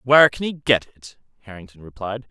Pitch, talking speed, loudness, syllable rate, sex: 115 Hz, 180 wpm, -19 LUFS, 5.7 syllables/s, male